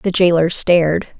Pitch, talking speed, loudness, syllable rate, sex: 170 Hz, 150 wpm, -14 LUFS, 4.8 syllables/s, female